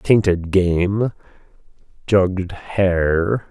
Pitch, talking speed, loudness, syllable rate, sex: 95 Hz, 70 wpm, -18 LUFS, 2.4 syllables/s, male